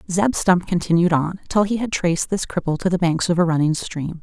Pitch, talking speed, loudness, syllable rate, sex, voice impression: 175 Hz, 240 wpm, -20 LUFS, 5.6 syllables/s, female, feminine, adult-like, fluent, intellectual, slightly sweet